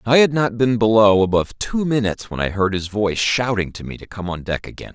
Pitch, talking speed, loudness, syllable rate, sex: 105 Hz, 255 wpm, -19 LUFS, 6.0 syllables/s, male